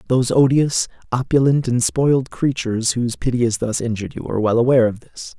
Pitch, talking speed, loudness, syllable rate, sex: 125 Hz, 190 wpm, -18 LUFS, 6.3 syllables/s, male